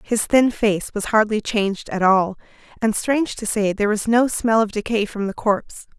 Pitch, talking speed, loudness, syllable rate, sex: 215 Hz, 210 wpm, -20 LUFS, 5.1 syllables/s, female